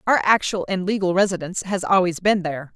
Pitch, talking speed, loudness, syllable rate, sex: 185 Hz, 195 wpm, -20 LUFS, 6.3 syllables/s, female